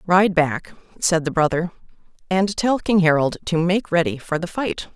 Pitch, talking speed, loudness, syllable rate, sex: 175 Hz, 180 wpm, -20 LUFS, 4.6 syllables/s, female